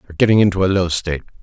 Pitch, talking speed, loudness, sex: 90 Hz, 250 wpm, -16 LUFS, male